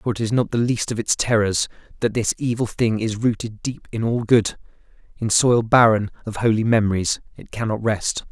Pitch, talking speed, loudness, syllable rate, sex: 110 Hz, 200 wpm, -20 LUFS, 5.2 syllables/s, male